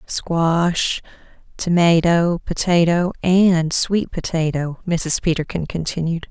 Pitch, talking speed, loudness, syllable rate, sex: 170 Hz, 85 wpm, -19 LUFS, 3.5 syllables/s, female